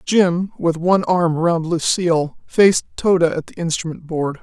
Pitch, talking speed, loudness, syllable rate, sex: 170 Hz, 165 wpm, -18 LUFS, 4.5 syllables/s, female